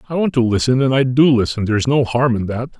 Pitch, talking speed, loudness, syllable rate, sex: 125 Hz, 280 wpm, -16 LUFS, 6.1 syllables/s, male